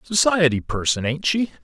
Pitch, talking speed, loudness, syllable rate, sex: 165 Hz, 145 wpm, -20 LUFS, 4.9 syllables/s, male